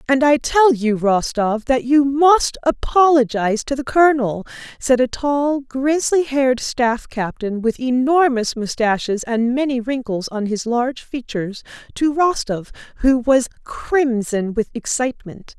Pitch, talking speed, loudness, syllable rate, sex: 255 Hz, 140 wpm, -18 LUFS, 4.2 syllables/s, female